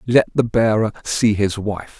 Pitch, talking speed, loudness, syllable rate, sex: 110 Hz, 180 wpm, -18 LUFS, 4.2 syllables/s, male